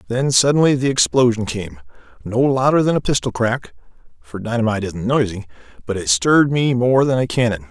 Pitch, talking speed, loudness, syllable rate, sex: 120 Hz, 170 wpm, -17 LUFS, 5.6 syllables/s, male